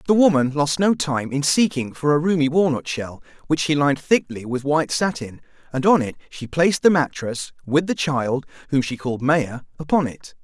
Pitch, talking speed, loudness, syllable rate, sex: 145 Hz, 200 wpm, -20 LUFS, 5.2 syllables/s, male